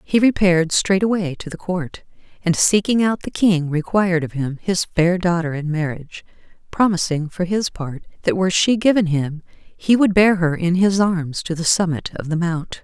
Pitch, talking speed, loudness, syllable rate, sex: 175 Hz, 190 wpm, -19 LUFS, 4.8 syllables/s, female